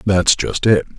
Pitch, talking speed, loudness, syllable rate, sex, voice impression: 95 Hz, 185 wpm, -16 LUFS, 4.0 syllables/s, male, very masculine, adult-like, slightly thick, cool, slightly intellectual, slightly wild, slightly sweet